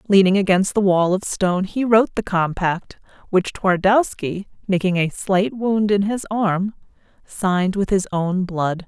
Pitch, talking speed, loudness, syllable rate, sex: 190 Hz, 160 wpm, -19 LUFS, 4.3 syllables/s, female